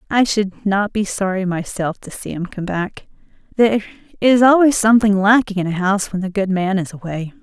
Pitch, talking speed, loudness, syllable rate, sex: 200 Hz, 195 wpm, -17 LUFS, 5.5 syllables/s, female